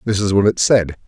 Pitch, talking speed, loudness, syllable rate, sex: 100 Hz, 280 wpm, -15 LUFS, 5.8 syllables/s, male